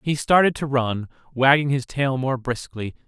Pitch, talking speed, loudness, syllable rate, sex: 130 Hz, 175 wpm, -21 LUFS, 4.6 syllables/s, male